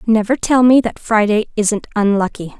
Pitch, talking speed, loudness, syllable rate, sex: 220 Hz, 160 wpm, -15 LUFS, 4.9 syllables/s, female